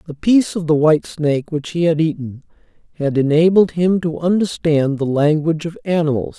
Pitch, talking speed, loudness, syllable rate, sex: 160 Hz, 180 wpm, -17 LUFS, 5.5 syllables/s, male